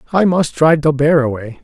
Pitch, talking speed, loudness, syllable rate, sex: 150 Hz, 220 wpm, -14 LUFS, 5.9 syllables/s, male